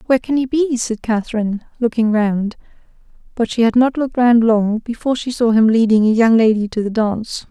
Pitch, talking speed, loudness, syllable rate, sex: 230 Hz, 210 wpm, -16 LUFS, 5.8 syllables/s, female